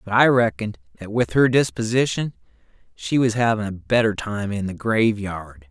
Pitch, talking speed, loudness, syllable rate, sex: 105 Hz, 170 wpm, -21 LUFS, 5.0 syllables/s, male